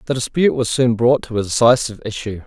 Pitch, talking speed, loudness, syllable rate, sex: 120 Hz, 220 wpm, -17 LUFS, 6.6 syllables/s, male